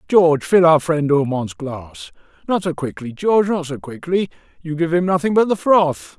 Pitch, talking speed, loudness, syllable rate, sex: 155 Hz, 195 wpm, -18 LUFS, 4.9 syllables/s, male